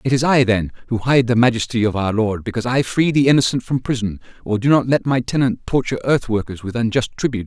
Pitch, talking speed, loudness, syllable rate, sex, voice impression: 120 Hz, 240 wpm, -18 LUFS, 6.4 syllables/s, male, very masculine, adult-like, slightly middle-aged, thick, very tensed, powerful, very bright, hard, very clear, very fluent, slightly raspy, cool, intellectual, very refreshing, sincere, very calm, slightly mature, very friendly, very reassuring, very unique, slightly elegant, wild, sweet, very lively, kind, slightly intense, very modest